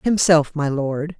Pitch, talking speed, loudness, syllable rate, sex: 155 Hz, 150 wpm, -19 LUFS, 3.7 syllables/s, female